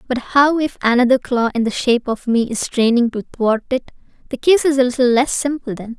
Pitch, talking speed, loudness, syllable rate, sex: 250 Hz, 220 wpm, -17 LUFS, 5.5 syllables/s, female